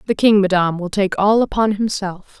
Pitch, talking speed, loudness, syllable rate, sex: 200 Hz, 200 wpm, -17 LUFS, 5.4 syllables/s, female